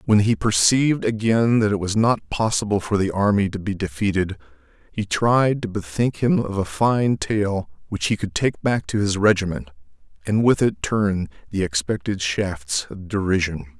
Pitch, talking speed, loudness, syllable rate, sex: 100 Hz, 180 wpm, -21 LUFS, 4.7 syllables/s, male